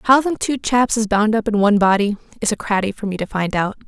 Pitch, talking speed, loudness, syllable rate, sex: 215 Hz, 280 wpm, -18 LUFS, 6.0 syllables/s, female